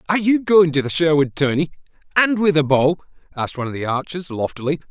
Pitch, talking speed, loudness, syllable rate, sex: 160 Hz, 210 wpm, -19 LUFS, 6.6 syllables/s, male